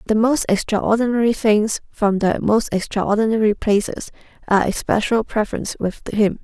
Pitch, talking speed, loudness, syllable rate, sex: 215 Hz, 130 wpm, -19 LUFS, 5.1 syllables/s, female